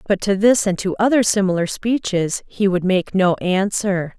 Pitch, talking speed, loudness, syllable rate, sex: 195 Hz, 185 wpm, -18 LUFS, 4.6 syllables/s, female